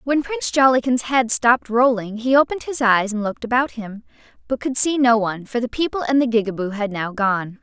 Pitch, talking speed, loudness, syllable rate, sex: 235 Hz, 220 wpm, -19 LUFS, 5.8 syllables/s, female